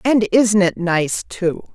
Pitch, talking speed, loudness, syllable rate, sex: 195 Hz, 170 wpm, -17 LUFS, 3.3 syllables/s, female